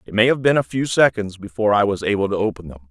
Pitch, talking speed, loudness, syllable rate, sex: 105 Hz, 290 wpm, -19 LUFS, 7.1 syllables/s, male